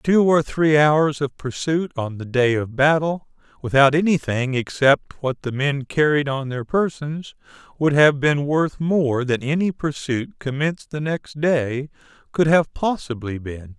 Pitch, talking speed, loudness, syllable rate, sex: 145 Hz, 160 wpm, -20 LUFS, 4.1 syllables/s, male